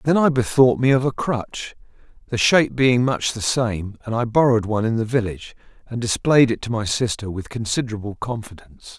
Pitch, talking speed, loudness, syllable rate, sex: 115 Hz, 195 wpm, -20 LUFS, 5.7 syllables/s, male